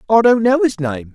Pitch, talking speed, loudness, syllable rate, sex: 205 Hz, 260 wpm, -15 LUFS, 5.3 syllables/s, male